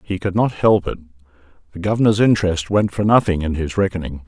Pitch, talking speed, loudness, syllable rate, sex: 95 Hz, 195 wpm, -18 LUFS, 6.2 syllables/s, male